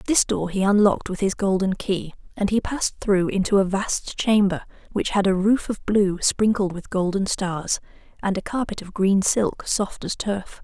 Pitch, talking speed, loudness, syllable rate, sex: 200 Hz, 200 wpm, -22 LUFS, 4.6 syllables/s, female